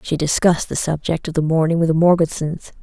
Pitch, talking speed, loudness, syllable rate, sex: 160 Hz, 215 wpm, -18 LUFS, 6.0 syllables/s, female